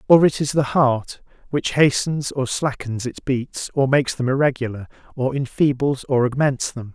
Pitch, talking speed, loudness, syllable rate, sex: 135 Hz, 175 wpm, -20 LUFS, 4.7 syllables/s, male